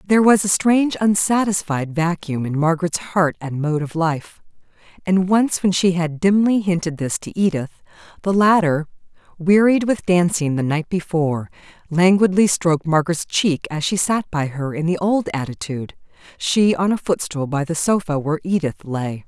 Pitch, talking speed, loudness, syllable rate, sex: 175 Hz, 165 wpm, -19 LUFS, 5.0 syllables/s, female